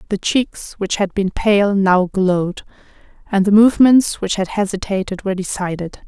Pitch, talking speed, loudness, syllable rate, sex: 195 Hz, 160 wpm, -17 LUFS, 4.9 syllables/s, female